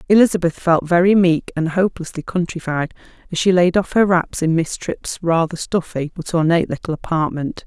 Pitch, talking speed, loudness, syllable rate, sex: 170 Hz, 170 wpm, -18 LUFS, 5.4 syllables/s, female